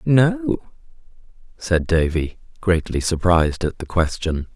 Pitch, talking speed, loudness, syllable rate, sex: 90 Hz, 105 wpm, -20 LUFS, 3.9 syllables/s, male